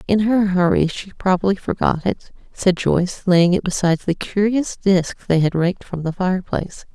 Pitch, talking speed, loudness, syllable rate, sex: 175 Hz, 180 wpm, -19 LUFS, 5.2 syllables/s, female